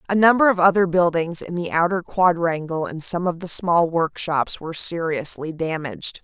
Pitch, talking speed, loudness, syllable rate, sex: 170 Hz, 175 wpm, -20 LUFS, 5.0 syllables/s, female